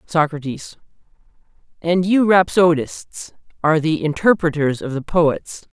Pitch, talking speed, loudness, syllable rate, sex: 165 Hz, 105 wpm, -18 LUFS, 4.2 syllables/s, male